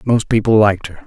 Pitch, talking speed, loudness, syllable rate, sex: 105 Hz, 225 wpm, -14 LUFS, 6.2 syllables/s, male